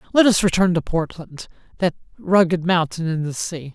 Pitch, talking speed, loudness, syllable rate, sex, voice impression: 175 Hz, 160 wpm, -20 LUFS, 5.1 syllables/s, male, slightly feminine, very adult-like, slightly muffled, slightly friendly, unique